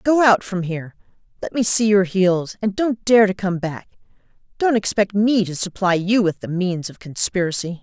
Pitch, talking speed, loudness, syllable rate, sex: 195 Hz, 200 wpm, -19 LUFS, 4.9 syllables/s, female